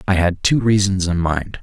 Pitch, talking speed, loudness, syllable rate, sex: 95 Hz, 220 wpm, -17 LUFS, 4.7 syllables/s, male